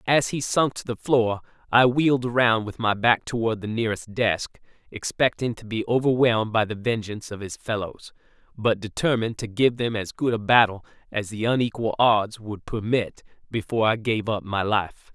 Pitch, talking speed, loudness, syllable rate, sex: 115 Hz, 185 wpm, -23 LUFS, 5.1 syllables/s, male